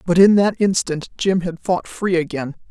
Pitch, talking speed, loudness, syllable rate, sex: 180 Hz, 200 wpm, -18 LUFS, 4.6 syllables/s, female